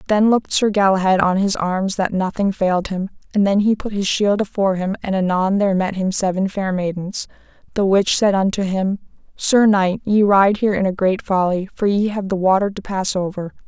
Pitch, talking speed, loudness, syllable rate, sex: 195 Hz, 215 wpm, -18 LUFS, 5.3 syllables/s, female